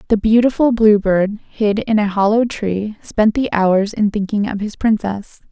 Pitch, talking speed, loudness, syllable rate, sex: 210 Hz, 185 wpm, -16 LUFS, 4.4 syllables/s, female